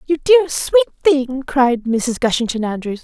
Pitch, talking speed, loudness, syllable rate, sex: 270 Hz, 160 wpm, -16 LUFS, 4.2 syllables/s, female